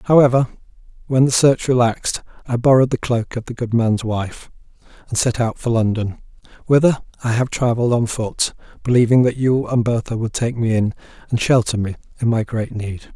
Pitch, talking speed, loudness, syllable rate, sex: 120 Hz, 185 wpm, -18 LUFS, 5.6 syllables/s, male